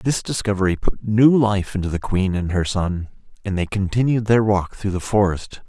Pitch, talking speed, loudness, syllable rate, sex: 100 Hz, 200 wpm, -20 LUFS, 5.0 syllables/s, male